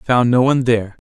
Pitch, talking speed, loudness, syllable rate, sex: 120 Hz, 280 wpm, -15 LUFS, 7.7 syllables/s, male